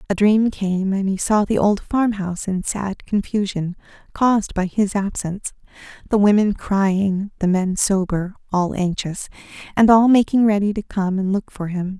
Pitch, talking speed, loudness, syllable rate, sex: 200 Hz, 170 wpm, -19 LUFS, 4.6 syllables/s, female